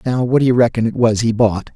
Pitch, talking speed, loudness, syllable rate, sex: 115 Hz, 305 wpm, -15 LUFS, 6.1 syllables/s, male